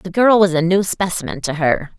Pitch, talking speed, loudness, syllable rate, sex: 175 Hz, 240 wpm, -16 LUFS, 5.3 syllables/s, female